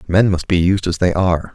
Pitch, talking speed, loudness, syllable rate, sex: 90 Hz, 270 wpm, -16 LUFS, 5.7 syllables/s, male